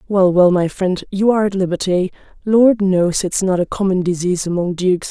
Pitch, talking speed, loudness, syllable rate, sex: 185 Hz, 200 wpm, -16 LUFS, 5.4 syllables/s, female